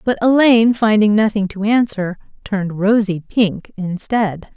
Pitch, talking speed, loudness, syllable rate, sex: 210 Hz, 130 wpm, -16 LUFS, 4.4 syllables/s, female